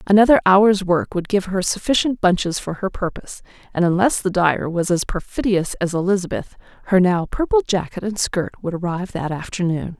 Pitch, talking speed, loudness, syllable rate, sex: 190 Hz, 180 wpm, -19 LUFS, 5.4 syllables/s, female